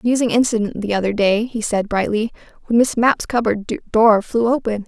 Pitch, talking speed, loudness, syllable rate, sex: 220 Hz, 185 wpm, -18 LUFS, 5.6 syllables/s, female